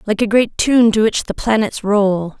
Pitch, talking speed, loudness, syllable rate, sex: 215 Hz, 225 wpm, -15 LUFS, 4.5 syllables/s, female